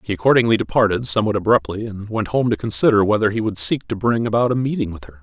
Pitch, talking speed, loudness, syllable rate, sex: 110 Hz, 240 wpm, -18 LUFS, 6.8 syllables/s, male